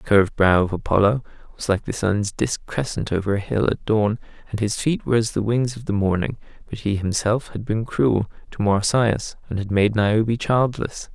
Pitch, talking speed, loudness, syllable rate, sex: 105 Hz, 210 wpm, -21 LUFS, 5.1 syllables/s, male